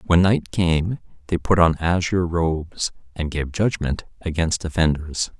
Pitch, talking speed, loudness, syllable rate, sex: 85 Hz, 145 wpm, -22 LUFS, 4.4 syllables/s, male